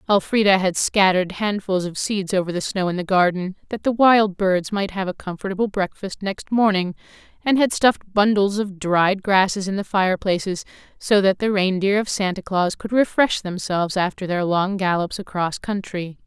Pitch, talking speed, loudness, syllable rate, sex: 195 Hz, 180 wpm, -20 LUFS, 5.0 syllables/s, female